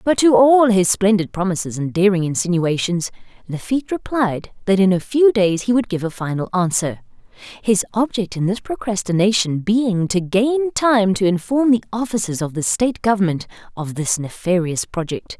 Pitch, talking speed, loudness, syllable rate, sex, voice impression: 200 Hz, 170 wpm, -18 LUFS, 5.0 syllables/s, female, feminine, adult-like, clear, slightly fluent, slightly refreshing, slightly sincere, slightly intense